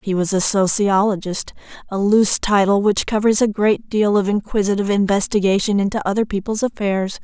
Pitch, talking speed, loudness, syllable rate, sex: 205 Hz, 150 wpm, -17 LUFS, 5.5 syllables/s, female